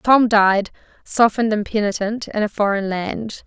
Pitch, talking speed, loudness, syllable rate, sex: 210 Hz, 155 wpm, -19 LUFS, 4.5 syllables/s, female